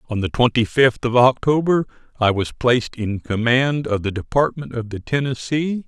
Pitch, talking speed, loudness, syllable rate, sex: 125 Hz, 175 wpm, -19 LUFS, 4.9 syllables/s, male